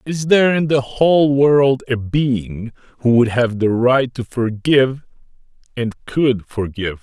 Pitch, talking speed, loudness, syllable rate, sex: 125 Hz, 155 wpm, -16 LUFS, 4.2 syllables/s, male